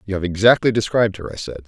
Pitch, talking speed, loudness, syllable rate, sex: 100 Hz, 250 wpm, -18 LUFS, 7.3 syllables/s, male